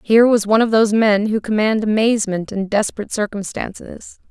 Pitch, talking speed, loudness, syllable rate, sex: 215 Hz, 165 wpm, -17 LUFS, 6.1 syllables/s, female